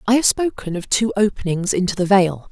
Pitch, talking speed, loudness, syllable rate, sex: 200 Hz, 215 wpm, -18 LUFS, 5.6 syllables/s, female